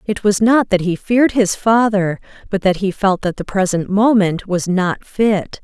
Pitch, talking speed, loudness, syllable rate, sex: 200 Hz, 200 wpm, -16 LUFS, 4.4 syllables/s, female